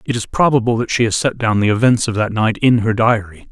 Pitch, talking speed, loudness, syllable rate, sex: 115 Hz, 275 wpm, -16 LUFS, 5.9 syllables/s, male